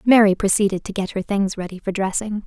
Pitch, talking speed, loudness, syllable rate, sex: 200 Hz, 220 wpm, -20 LUFS, 5.9 syllables/s, female